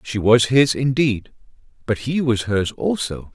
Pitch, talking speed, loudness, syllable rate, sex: 120 Hz, 160 wpm, -19 LUFS, 4.1 syllables/s, male